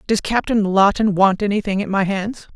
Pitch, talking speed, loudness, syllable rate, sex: 200 Hz, 190 wpm, -18 LUFS, 5.1 syllables/s, female